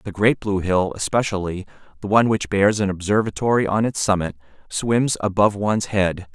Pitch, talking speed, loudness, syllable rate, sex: 100 Hz, 150 wpm, -20 LUFS, 5.5 syllables/s, male